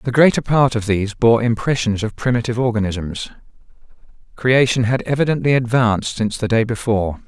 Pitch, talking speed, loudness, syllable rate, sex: 115 Hz, 150 wpm, -17 LUFS, 5.9 syllables/s, male